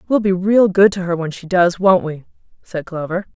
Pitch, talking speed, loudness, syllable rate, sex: 185 Hz, 235 wpm, -16 LUFS, 5.1 syllables/s, female